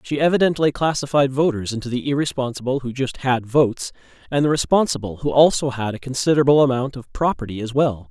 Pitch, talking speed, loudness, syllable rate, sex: 135 Hz, 180 wpm, -20 LUFS, 6.2 syllables/s, male